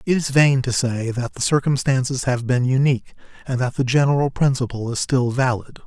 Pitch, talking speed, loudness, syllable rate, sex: 130 Hz, 195 wpm, -20 LUFS, 5.5 syllables/s, male